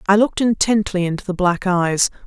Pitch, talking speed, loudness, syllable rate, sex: 190 Hz, 185 wpm, -18 LUFS, 5.6 syllables/s, female